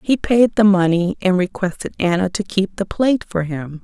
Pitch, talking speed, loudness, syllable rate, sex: 190 Hz, 205 wpm, -18 LUFS, 5.0 syllables/s, female